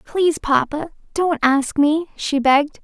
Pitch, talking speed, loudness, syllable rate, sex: 300 Hz, 150 wpm, -19 LUFS, 4.3 syllables/s, female